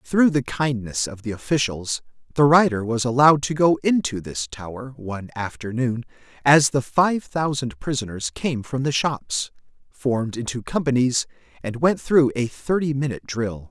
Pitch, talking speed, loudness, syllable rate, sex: 130 Hz, 160 wpm, -22 LUFS, 4.8 syllables/s, male